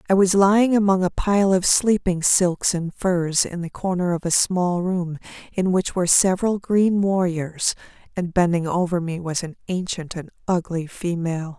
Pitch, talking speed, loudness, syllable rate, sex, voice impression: 180 Hz, 175 wpm, -21 LUFS, 4.6 syllables/s, female, feminine, adult-like, slightly soft, sincere, slightly friendly, slightly reassuring